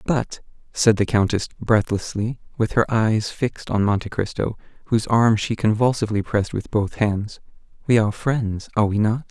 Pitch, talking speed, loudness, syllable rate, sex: 110 Hz, 170 wpm, -21 LUFS, 5.2 syllables/s, male